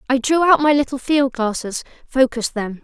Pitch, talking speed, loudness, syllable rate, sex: 260 Hz, 190 wpm, -18 LUFS, 5.4 syllables/s, female